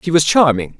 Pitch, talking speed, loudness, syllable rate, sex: 150 Hz, 230 wpm, -13 LUFS, 5.8 syllables/s, male